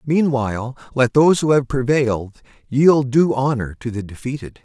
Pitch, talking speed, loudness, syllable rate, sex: 130 Hz, 155 wpm, -18 LUFS, 5.0 syllables/s, male